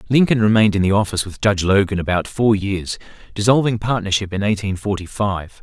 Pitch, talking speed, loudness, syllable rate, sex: 105 Hz, 180 wpm, -18 LUFS, 6.0 syllables/s, male